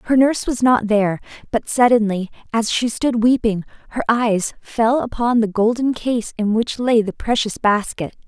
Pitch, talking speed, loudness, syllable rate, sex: 225 Hz, 175 wpm, -18 LUFS, 4.7 syllables/s, female